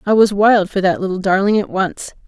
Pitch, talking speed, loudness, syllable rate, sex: 195 Hz, 240 wpm, -15 LUFS, 5.3 syllables/s, female